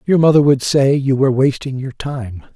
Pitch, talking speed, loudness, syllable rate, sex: 135 Hz, 210 wpm, -15 LUFS, 5.1 syllables/s, male